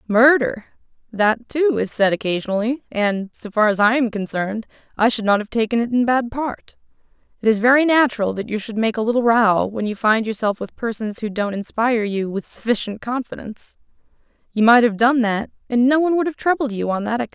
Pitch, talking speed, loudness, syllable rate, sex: 230 Hz, 210 wpm, -19 LUFS, 5.8 syllables/s, female